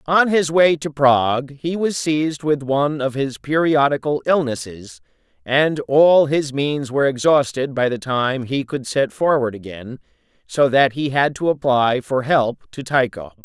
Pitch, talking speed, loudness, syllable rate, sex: 140 Hz, 170 wpm, -18 LUFS, 4.3 syllables/s, male